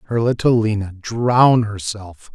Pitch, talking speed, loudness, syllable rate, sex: 110 Hz, 130 wpm, -17 LUFS, 3.8 syllables/s, male